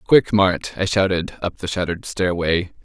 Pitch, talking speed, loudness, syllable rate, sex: 90 Hz, 170 wpm, -20 LUFS, 4.8 syllables/s, male